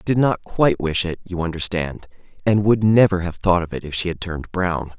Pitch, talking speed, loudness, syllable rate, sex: 90 Hz, 240 wpm, -20 LUFS, 5.8 syllables/s, male